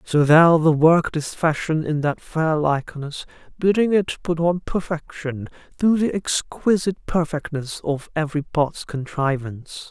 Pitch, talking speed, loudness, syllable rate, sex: 160 Hz, 140 wpm, -21 LUFS, 4.3 syllables/s, male